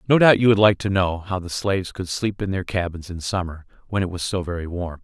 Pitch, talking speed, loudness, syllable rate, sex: 95 Hz, 275 wpm, -22 LUFS, 5.9 syllables/s, male